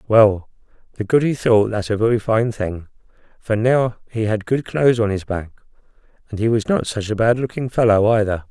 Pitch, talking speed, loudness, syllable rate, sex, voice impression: 110 Hz, 200 wpm, -18 LUFS, 5.3 syllables/s, male, very masculine, middle-aged, thick, tensed, slightly powerful, slightly dark, slightly soft, muffled, slightly fluent, raspy, cool, intellectual, slightly refreshing, sincere, very calm, mature, friendly, very reassuring, unique, elegant, wild, sweet, lively, kind, modest